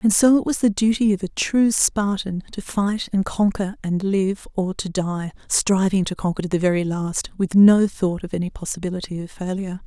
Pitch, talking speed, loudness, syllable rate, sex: 195 Hz, 205 wpm, -21 LUFS, 5.1 syllables/s, female